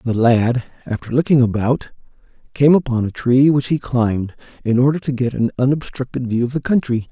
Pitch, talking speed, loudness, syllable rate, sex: 125 Hz, 185 wpm, -17 LUFS, 5.4 syllables/s, male